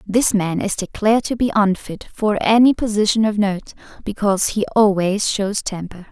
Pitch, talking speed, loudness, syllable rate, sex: 205 Hz, 165 wpm, -18 LUFS, 4.9 syllables/s, female